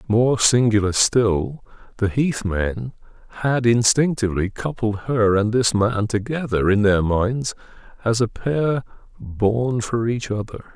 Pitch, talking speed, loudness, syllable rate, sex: 115 Hz, 130 wpm, -20 LUFS, 3.9 syllables/s, male